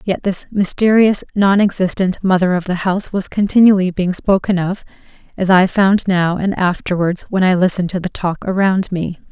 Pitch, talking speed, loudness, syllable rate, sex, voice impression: 190 Hz, 175 wpm, -15 LUFS, 5.1 syllables/s, female, feminine, adult-like, slightly cute, slightly sincere, calm, slightly sweet